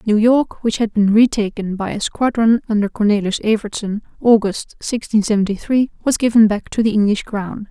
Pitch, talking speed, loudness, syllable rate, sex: 215 Hz, 180 wpm, -17 LUFS, 5.2 syllables/s, female